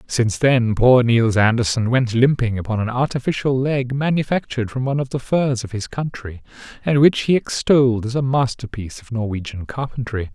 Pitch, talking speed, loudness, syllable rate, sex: 120 Hz, 175 wpm, -19 LUFS, 5.4 syllables/s, male